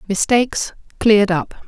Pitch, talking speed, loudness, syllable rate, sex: 210 Hz, 110 wpm, -17 LUFS, 5.0 syllables/s, female